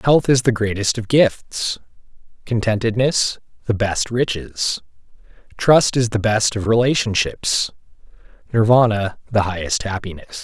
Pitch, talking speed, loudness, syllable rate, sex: 110 Hz, 115 wpm, -18 LUFS, 4.2 syllables/s, male